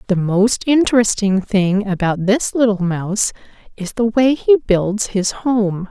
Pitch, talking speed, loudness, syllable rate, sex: 210 Hz, 150 wpm, -16 LUFS, 4.0 syllables/s, female